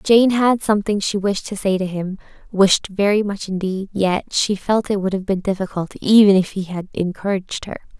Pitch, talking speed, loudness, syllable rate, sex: 195 Hz, 195 wpm, -19 LUFS, 5.0 syllables/s, female